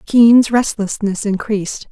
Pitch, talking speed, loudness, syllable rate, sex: 215 Hz, 95 wpm, -15 LUFS, 4.5 syllables/s, female